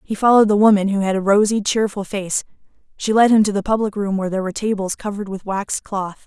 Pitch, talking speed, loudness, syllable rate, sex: 205 Hz, 240 wpm, -18 LUFS, 6.8 syllables/s, female